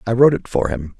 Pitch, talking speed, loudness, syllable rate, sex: 110 Hz, 300 wpm, -17 LUFS, 6.9 syllables/s, male